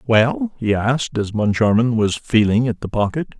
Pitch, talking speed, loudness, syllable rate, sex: 115 Hz, 175 wpm, -18 LUFS, 4.9 syllables/s, male